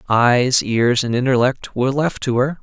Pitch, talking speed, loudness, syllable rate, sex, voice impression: 125 Hz, 185 wpm, -17 LUFS, 4.5 syllables/s, male, masculine, adult-like, tensed, powerful, bright, clear, fluent, nasal, cool, slightly refreshing, friendly, reassuring, slightly wild, lively, kind